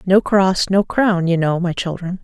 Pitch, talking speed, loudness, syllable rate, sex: 185 Hz, 215 wpm, -17 LUFS, 4.3 syllables/s, female